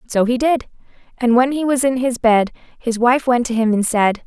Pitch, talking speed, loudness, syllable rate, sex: 245 Hz, 240 wpm, -17 LUFS, 5.0 syllables/s, female